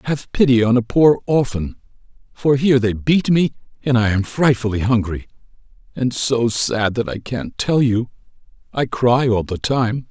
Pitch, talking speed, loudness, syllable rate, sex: 120 Hz, 170 wpm, -18 LUFS, 4.5 syllables/s, male